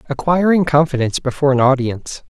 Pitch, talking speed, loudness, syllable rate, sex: 140 Hz, 130 wpm, -16 LUFS, 6.8 syllables/s, male